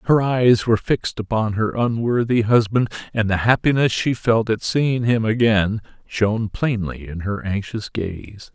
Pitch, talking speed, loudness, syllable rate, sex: 110 Hz, 160 wpm, -20 LUFS, 4.4 syllables/s, male